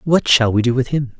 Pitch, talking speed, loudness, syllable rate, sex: 130 Hz, 300 wpm, -16 LUFS, 5.6 syllables/s, male